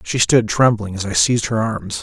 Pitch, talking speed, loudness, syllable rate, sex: 110 Hz, 235 wpm, -17 LUFS, 5.2 syllables/s, male